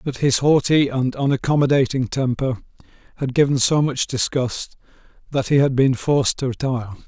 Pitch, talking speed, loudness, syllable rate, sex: 135 Hz, 155 wpm, -19 LUFS, 5.3 syllables/s, male